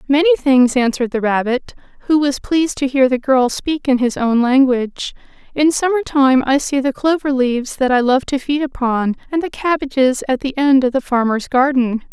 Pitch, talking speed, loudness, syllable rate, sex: 265 Hz, 205 wpm, -16 LUFS, 5.2 syllables/s, female